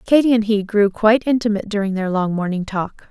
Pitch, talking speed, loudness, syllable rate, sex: 210 Hz, 210 wpm, -18 LUFS, 6.2 syllables/s, female